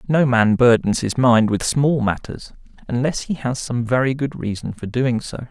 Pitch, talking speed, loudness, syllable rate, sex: 125 Hz, 195 wpm, -19 LUFS, 4.6 syllables/s, male